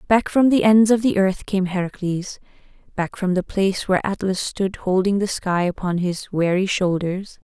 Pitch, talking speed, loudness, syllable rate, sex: 190 Hz, 185 wpm, -20 LUFS, 4.8 syllables/s, female